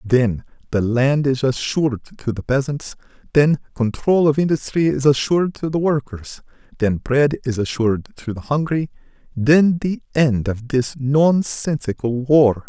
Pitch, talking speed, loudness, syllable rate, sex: 135 Hz, 145 wpm, -19 LUFS, 4.4 syllables/s, male